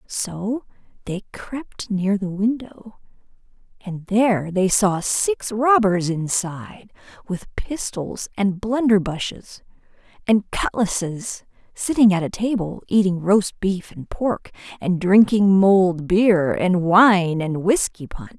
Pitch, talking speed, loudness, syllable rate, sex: 200 Hz, 120 wpm, -20 LUFS, 3.6 syllables/s, female